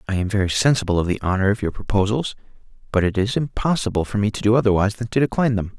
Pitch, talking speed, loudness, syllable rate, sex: 105 Hz, 240 wpm, -20 LUFS, 7.4 syllables/s, male